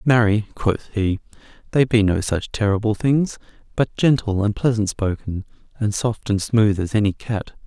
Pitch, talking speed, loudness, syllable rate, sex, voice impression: 110 Hz, 165 wpm, -21 LUFS, 4.6 syllables/s, male, masculine, adult-like, slightly relaxed, soft, slightly fluent, intellectual, sincere, friendly, reassuring, lively, kind, slightly modest